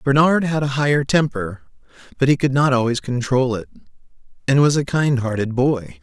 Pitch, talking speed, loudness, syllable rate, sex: 130 Hz, 180 wpm, -19 LUFS, 5.1 syllables/s, male